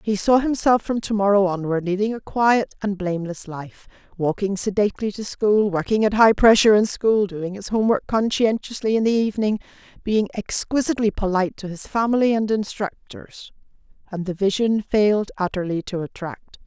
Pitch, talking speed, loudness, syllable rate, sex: 205 Hz, 160 wpm, -21 LUFS, 5.4 syllables/s, female